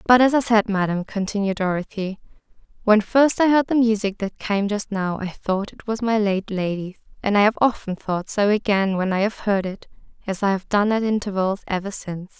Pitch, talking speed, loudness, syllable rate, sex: 205 Hz, 215 wpm, -21 LUFS, 5.3 syllables/s, female